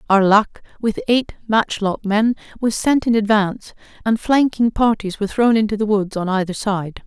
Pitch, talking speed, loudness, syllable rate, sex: 215 Hz, 170 wpm, -18 LUFS, 4.8 syllables/s, female